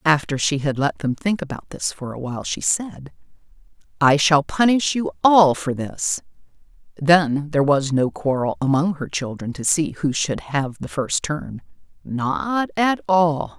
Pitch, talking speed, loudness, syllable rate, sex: 140 Hz, 170 wpm, -20 LUFS, 4.2 syllables/s, female